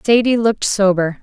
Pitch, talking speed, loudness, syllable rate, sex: 210 Hz, 145 wpm, -15 LUFS, 5.5 syllables/s, female